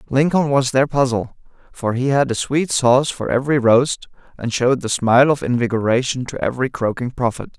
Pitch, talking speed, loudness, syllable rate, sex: 130 Hz, 180 wpm, -18 LUFS, 5.6 syllables/s, male